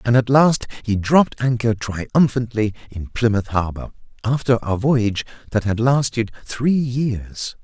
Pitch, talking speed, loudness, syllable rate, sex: 115 Hz, 140 wpm, -19 LUFS, 4.2 syllables/s, male